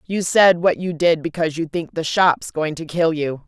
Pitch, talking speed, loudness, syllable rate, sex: 165 Hz, 240 wpm, -19 LUFS, 4.8 syllables/s, female